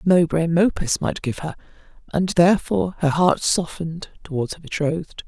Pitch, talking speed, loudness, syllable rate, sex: 165 Hz, 160 wpm, -21 LUFS, 5.4 syllables/s, female